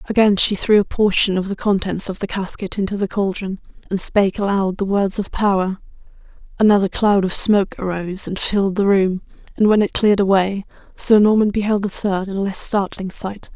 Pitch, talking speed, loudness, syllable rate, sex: 195 Hz, 195 wpm, -18 LUFS, 5.5 syllables/s, female